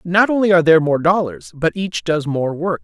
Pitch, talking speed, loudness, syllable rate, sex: 165 Hz, 230 wpm, -16 LUFS, 5.6 syllables/s, male